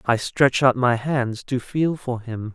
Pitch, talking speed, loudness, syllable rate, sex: 125 Hz, 215 wpm, -21 LUFS, 4.1 syllables/s, male